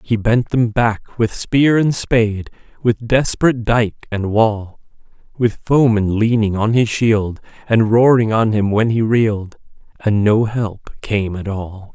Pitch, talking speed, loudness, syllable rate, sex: 110 Hz, 160 wpm, -16 LUFS, 4.0 syllables/s, male